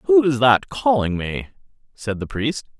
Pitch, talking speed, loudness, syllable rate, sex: 120 Hz, 170 wpm, -20 LUFS, 4.0 syllables/s, male